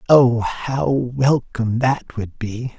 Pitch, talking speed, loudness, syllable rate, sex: 125 Hz, 130 wpm, -19 LUFS, 3.1 syllables/s, male